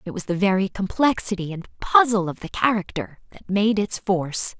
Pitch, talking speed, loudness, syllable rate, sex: 195 Hz, 185 wpm, -22 LUFS, 5.2 syllables/s, female